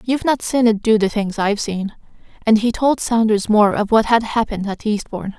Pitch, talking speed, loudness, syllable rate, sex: 215 Hz, 225 wpm, -17 LUFS, 5.6 syllables/s, female